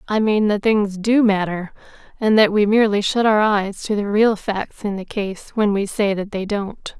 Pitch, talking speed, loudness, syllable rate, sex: 205 Hz, 225 wpm, -19 LUFS, 4.6 syllables/s, female